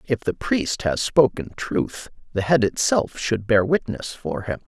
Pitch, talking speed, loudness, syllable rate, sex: 120 Hz, 175 wpm, -22 LUFS, 4.1 syllables/s, male